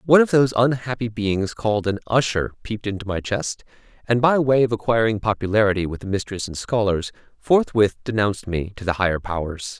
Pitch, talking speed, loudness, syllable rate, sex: 110 Hz, 185 wpm, -21 LUFS, 5.9 syllables/s, male